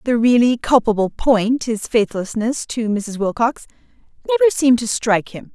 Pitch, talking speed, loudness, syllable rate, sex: 230 Hz, 130 wpm, -17 LUFS, 5.0 syllables/s, female